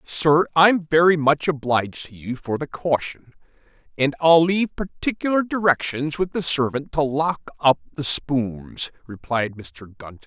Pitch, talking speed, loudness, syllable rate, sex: 145 Hz, 150 wpm, -21 LUFS, 4.3 syllables/s, male